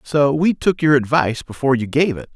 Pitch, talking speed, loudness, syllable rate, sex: 140 Hz, 230 wpm, -17 LUFS, 5.8 syllables/s, male